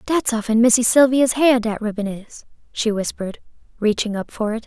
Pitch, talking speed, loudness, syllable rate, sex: 230 Hz, 180 wpm, -19 LUFS, 5.1 syllables/s, female